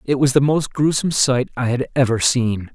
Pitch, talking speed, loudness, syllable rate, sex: 130 Hz, 220 wpm, -18 LUFS, 5.1 syllables/s, male